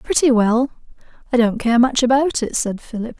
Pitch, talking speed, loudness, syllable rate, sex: 245 Hz, 190 wpm, -18 LUFS, 5.3 syllables/s, female